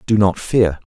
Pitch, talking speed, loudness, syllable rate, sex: 100 Hz, 200 wpm, -17 LUFS, 4.3 syllables/s, male